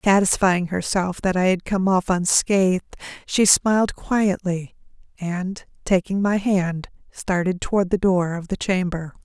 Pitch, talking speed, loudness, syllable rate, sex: 185 Hz, 145 wpm, -21 LUFS, 4.2 syllables/s, female